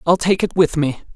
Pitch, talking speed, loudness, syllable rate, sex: 165 Hz, 260 wpm, -17 LUFS, 5.6 syllables/s, male